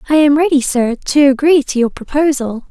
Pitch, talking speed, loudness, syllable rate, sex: 280 Hz, 200 wpm, -13 LUFS, 5.5 syllables/s, female